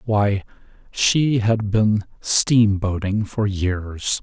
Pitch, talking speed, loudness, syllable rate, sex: 105 Hz, 100 wpm, -20 LUFS, 2.6 syllables/s, male